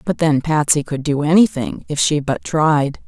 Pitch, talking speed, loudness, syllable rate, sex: 150 Hz, 195 wpm, -17 LUFS, 4.5 syllables/s, female